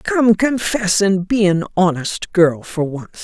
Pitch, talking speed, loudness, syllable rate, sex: 195 Hz, 165 wpm, -16 LUFS, 3.6 syllables/s, female